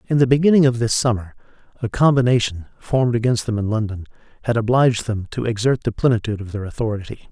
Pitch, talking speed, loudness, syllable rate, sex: 115 Hz, 190 wpm, -19 LUFS, 6.7 syllables/s, male